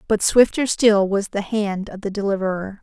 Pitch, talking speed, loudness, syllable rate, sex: 205 Hz, 190 wpm, -19 LUFS, 4.9 syllables/s, female